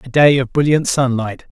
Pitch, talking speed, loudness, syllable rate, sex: 130 Hz, 190 wpm, -15 LUFS, 5.0 syllables/s, male